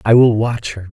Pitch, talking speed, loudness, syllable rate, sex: 110 Hz, 255 wpm, -15 LUFS, 4.8 syllables/s, male